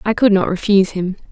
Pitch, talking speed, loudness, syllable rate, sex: 200 Hz, 230 wpm, -16 LUFS, 6.4 syllables/s, female